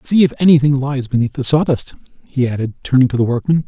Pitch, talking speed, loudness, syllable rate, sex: 135 Hz, 210 wpm, -15 LUFS, 6.4 syllables/s, male